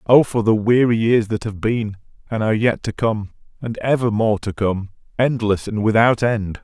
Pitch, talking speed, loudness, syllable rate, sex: 110 Hz, 190 wpm, -19 LUFS, 5.0 syllables/s, male